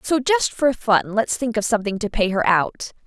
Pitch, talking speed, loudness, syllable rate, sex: 230 Hz, 235 wpm, -20 LUFS, 5.1 syllables/s, female